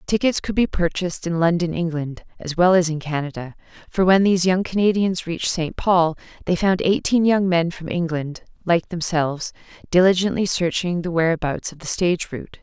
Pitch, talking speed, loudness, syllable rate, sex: 175 Hz, 175 wpm, -20 LUFS, 5.4 syllables/s, female